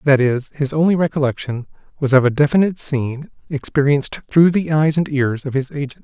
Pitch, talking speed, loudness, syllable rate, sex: 145 Hz, 190 wpm, -18 LUFS, 5.7 syllables/s, male